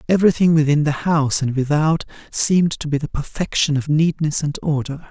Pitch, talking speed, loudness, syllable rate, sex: 155 Hz, 175 wpm, -19 LUFS, 5.5 syllables/s, male